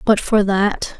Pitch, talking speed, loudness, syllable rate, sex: 215 Hz, 180 wpm, -17 LUFS, 3.4 syllables/s, female